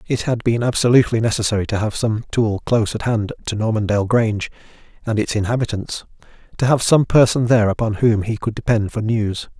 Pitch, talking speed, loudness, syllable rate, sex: 110 Hz, 190 wpm, -18 LUFS, 6.0 syllables/s, male